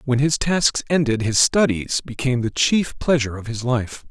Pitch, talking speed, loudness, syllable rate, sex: 130 Hz, 190 wpm, -20 LUFS, 5.0 syllables/s, male